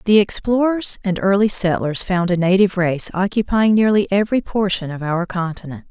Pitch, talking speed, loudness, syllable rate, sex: 190 Hz, 160 wpm, -18 LUFS, 5.3 syllables/s, female